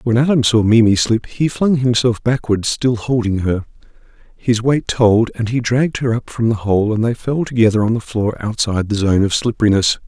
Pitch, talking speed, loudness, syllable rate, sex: 115 Hz, 210 wpm, -16 LUFS, 5.2 syllables/s, male